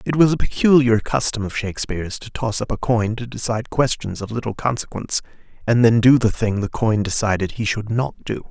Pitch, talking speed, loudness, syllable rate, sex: 115 Hz, 210 wpm, -20 LUFS, 5.8 syllables/s, male